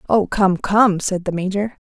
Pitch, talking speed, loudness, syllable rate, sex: 195 Hz, 190 wpm, -18 LUFS, 4.3 syllables/s, female